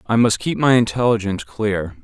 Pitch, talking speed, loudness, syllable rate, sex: 105 Hz, 175 wpm, -18 LUFS, 5.4 syllables/s, male